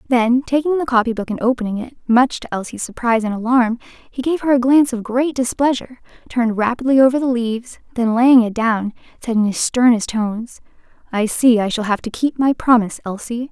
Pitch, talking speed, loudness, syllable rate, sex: 240 Hz, 205 wpm, -17 LUFS, 5.8 syllables/s, female